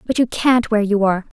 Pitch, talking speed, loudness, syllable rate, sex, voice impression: 220 Hz, 260 wpm, -17 LUFS, 6.7 syllables/s, female, very feminine, slightly young, thin, tensed, slightly weak, slightly dark, very hard, very clear, very fluent, slightly raspy, very cute, very intellectual, very refreshing, sincere, calm, very friendly, reassuring, very unique, very elegant, slightly wild, very sweet, lively, strict, slightly intense, slightly sharp, very light